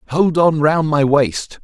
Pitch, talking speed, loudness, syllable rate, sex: 150 Hz, 185 wpm, -15 LUFS, 3.7 syllables/s, male